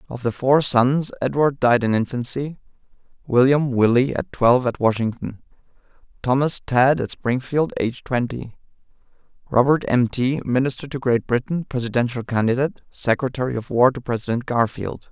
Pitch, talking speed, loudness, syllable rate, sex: 125 Hz, 140 wpm, -20 LUFS, 5.4 syllables/s, male